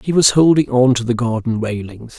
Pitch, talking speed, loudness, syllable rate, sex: 125 Hz, 220 wpm, -15 LUFS, 5.3 syllables/s, male